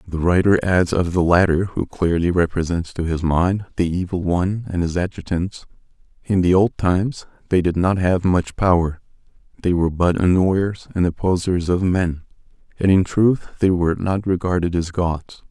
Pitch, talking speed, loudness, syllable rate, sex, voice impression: 90 Hz, 175 wpm, -19 LUFS, 4.9 syllables/s, male, very masculine, very adult-like, old, very thick, slightly relaxed, weak, slightly dark, very soft, muffled, fluent, slightly raspy, very cool, very intellectual, sincere, very calm, very mature, very friendly, very reassuring, unique, elegant, very wild, slightly sweet, very kind, very modest